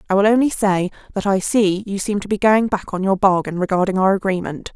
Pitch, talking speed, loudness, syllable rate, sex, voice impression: 195 Hz, 240 wpm, -18 LUFS, 5.9 syllables/s, female, very feminine, thin, tensed, slightly powerful, slightly bright, hard, clear, very fluent, slightly raspy, slightly cool, intellectual, refreshing, sincere, slightly calm, slightly friendly, slightly reassuring, very unique, slightly elegant, wild, slightly sweet, very lively, strict, very intense, sharp, slightly light